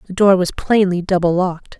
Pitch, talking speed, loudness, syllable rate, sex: 185 Hz, 200 wpm, -16 LUFS, 5.5 syllables/s, female